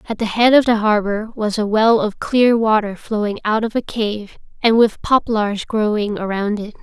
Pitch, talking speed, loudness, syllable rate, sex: 215 Hz, 200 wpm, -17 LUFS, 4.6 syllables/s, female